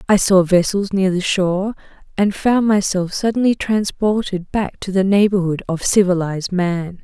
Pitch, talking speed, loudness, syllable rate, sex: 190 Hz, 155 wpm, -17 LUFS, 4.7 syllables/s, female